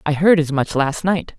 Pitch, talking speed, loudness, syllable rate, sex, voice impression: 160 Hz, 260 wpm, -17 LUFS, 4.7 syllables/s, female, slightly feminine, slightly adult-like, refreshing, slightly friendly, slightly unique